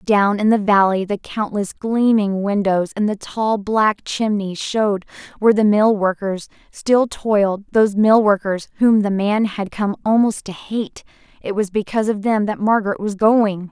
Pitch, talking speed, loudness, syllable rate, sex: 205 Hz, 170 wpm, -18 LUFS, 4.5 syllables/s, female